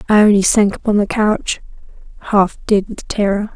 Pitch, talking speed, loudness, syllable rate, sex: 205 Hz, 150 wpm, -15 LUFS, 4.0 syllables/s, female